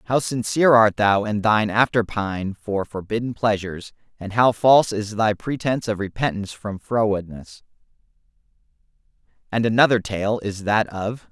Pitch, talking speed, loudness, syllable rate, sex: 110 Hz, 145 wpm, -21 LUFS, 5.0 syllables/s, male